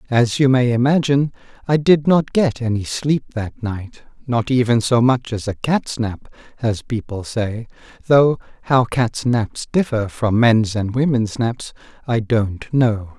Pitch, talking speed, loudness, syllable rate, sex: 120 Hz, 165 wpm, -18 LUFS, 4.0 syllables/s, male